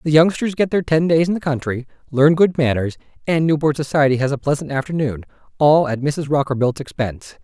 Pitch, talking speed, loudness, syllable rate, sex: 145 Hz, 185 wpm, -18 LUFS, 5.8 syllables/s, male